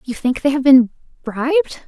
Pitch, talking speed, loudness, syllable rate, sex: 270 Hz, 190 wpm, -16 LUFS, 6.3 syllables/s, female